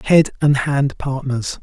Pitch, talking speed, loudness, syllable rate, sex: 140 Hz, 145 wpm, -18 LUFS, 3.4 syllables/s, male